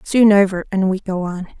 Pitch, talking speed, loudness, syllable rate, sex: 195 Hz, 225 wpm, -17 LUFS, 5.3 syllables/s, female